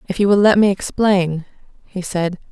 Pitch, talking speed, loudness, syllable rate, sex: 190 Hz, 190 wpm, -16 LUFS, 4.8 syllables/s, female